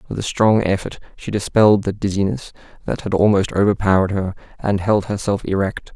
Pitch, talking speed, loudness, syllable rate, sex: 100 Hz, 170 wpm, -18 LUFS, 5.8 syllables/s, male